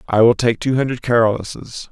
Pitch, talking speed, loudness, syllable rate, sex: 115 Hz, 190 wpm, -17 LUFS, 5.7 syllables/s, male